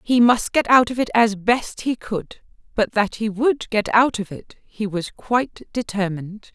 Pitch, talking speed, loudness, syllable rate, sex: 220 Hz, 195 wpm, -20 LUFS, 4.3 syllables/s, female